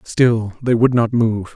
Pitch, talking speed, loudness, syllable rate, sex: 115 Hz, 195 wpm, -17 LUFS, 3.8 syllables/s, male